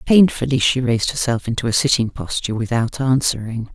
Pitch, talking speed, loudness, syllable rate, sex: 125 Hz, 160 wpm, -18 LUFS, 5.8 syllables/s, female